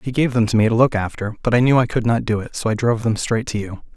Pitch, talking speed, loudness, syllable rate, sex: 115 Hz, 350 wpm, -19 LUFS, 6.8 syllables/s, male